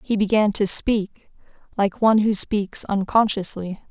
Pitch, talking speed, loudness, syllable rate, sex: 205 Hz, 140 wpm, -20 LUFS, 4.3 syllables/s, female